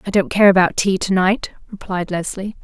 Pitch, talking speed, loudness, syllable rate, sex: 190 Hz, 205 wpm, -17 LUFS, 5.2 syllables/s, female